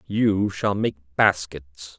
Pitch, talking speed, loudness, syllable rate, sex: 90 Hz, 120 wpm, -22 LUFS, 2.7 syllables/s, male